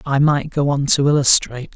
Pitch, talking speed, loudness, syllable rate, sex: 140 Hz, 205 wpm, -16 LUFS, 5.4 syllables/s, male